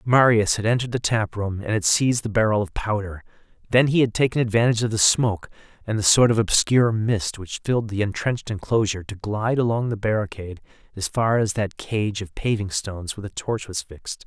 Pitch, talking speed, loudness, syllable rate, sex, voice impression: 105 Hz, 210 wpm, -22 LUFS, 6.1 syllables/s, male, masculine, very adult-like, slightly thick, slightly fluent, slightly refreshing, sincere